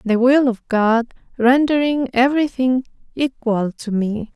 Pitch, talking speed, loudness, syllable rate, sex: 245 Hz, 125 wpm, -18 LUFS, 4.1 syllables/s, female